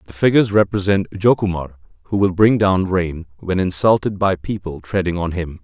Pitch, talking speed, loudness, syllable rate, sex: 95 Hz, 170 wpm, -18 LUFS, 5.5 syllables/s, male